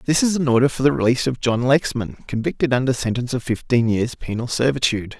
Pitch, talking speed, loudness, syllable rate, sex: 125 Hz, 210 wpm, -20 LUFS, 6.5 syllables/s, male